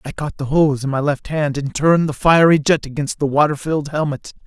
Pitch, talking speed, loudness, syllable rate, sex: 145 Hz, 240 wpm, -17 LUFS, 5.7 syllables/s, male